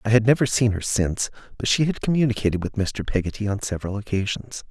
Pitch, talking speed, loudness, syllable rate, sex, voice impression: 110 Hz, 205 wpm, -23 LUFS, 6.5 syllables/s, male, very masculine, slightly middle-aged, slightly thick, slightly tensed, powerful, bright, soft, slightly muffled, fluent, raspy, cool, intellectual, slightly refreshing, sincere, very calm, mature, very friendly, reassuring, unique, elegant, slightly wild, sweet, slightly lively, kind, very modest